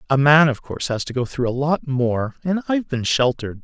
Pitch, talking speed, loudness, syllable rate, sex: 135 Hz, 250 wpm, -20 LUFS, 5.8 syllables/s, male